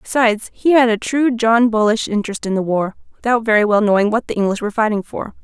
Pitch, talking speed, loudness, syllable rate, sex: 220 Hz, 230 wpm, -16 LUFS, 6.4 syllables/s, female